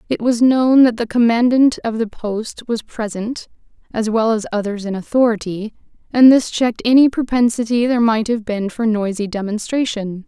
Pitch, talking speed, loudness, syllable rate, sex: 225 Hz, 170 wpm, -17 LUFS, 5.1 syllables/s, female